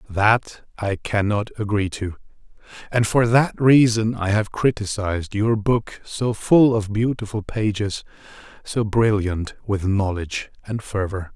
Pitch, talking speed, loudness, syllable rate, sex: 105 Hz, 130 wpm, -21 LUFS, 4.0 syllables/s, male